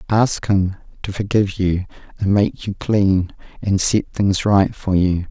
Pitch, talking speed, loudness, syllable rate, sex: 100 Hz, 170 wpm, -19 LUFS, 4.0 syllables/s, male